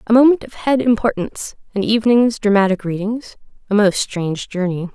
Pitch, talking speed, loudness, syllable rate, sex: 215 Hz, 135 wpm, -17 LUFS, 5.6 syllables/s, female